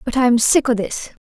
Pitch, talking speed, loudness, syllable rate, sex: 245 Hz, 240 wpm, -16 LUFS, 4.7 syllables/s, female